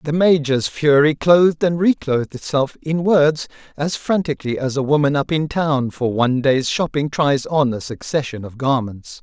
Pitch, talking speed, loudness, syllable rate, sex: 145 Hz, 175 wpm, -18 LUFS, 4.8 syllables/s, male